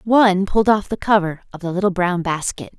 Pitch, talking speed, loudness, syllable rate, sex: 190 Hz, 215 wpm, -18 LUFS, 5.9 syllables/s, female